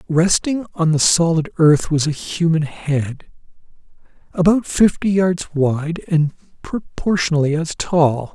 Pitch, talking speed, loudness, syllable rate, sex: 165 Hz, 120 wpm, -18 LUFS, 3.9 syllables/s, male